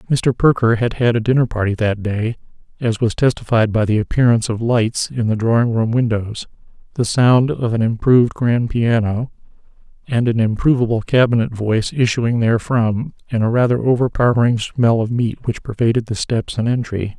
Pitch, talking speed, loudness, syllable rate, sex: 115 Hz, 170 wpm, -17 LUFS, 5.3 syllables/s, male